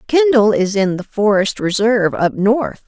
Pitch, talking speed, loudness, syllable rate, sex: 215 Hz, 165 wpm, -15 LUFS, 4.4 syllables/s, female